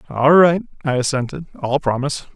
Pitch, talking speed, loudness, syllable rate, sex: 145 Hz, 155 wpm, -18 LUFS, 5.9 syllables/s, male